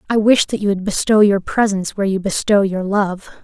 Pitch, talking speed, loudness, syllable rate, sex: 200 Hz, 225 wpm, -16 LUFS, 5.8 syllables/s, female